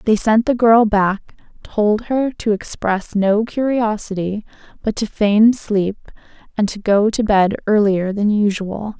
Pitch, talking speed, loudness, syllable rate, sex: 210 Hz, 155 wpm, -17 LUFS, 3.8 syllables/s, female